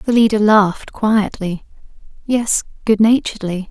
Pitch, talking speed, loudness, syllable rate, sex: 210 Hz, 95 wpm, -16 LUFS, 4.6 syllables/s, female